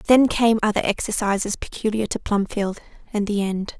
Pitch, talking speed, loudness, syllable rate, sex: 210 Hz, 160 wpm, -22 LUFS, 5.1 syllables/s, female